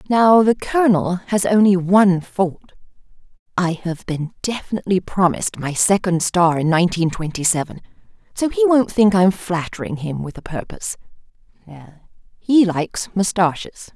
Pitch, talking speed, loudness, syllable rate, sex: 185 Hz, 140 wpm, -18 LUFS, 2.6 syllables/s, female